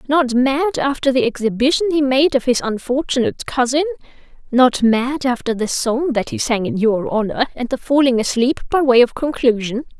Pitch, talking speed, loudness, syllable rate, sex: 255 Hz, 180 wpm, -17 LUFS, 5.1 syllables/s, female